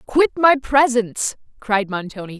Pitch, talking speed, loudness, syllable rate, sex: 235 Hz, 125 wpm, -18 LUFS, 4.5 syllables/s, female